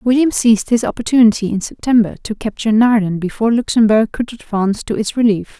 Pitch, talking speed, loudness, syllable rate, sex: 220 Hz, 170 wpm, -15 LUFS, 6.2 syllables/s, female